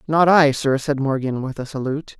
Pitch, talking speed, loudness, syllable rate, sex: 140 Hz, 220 wpm, -19 LUFS, 5.4 syllables/s, male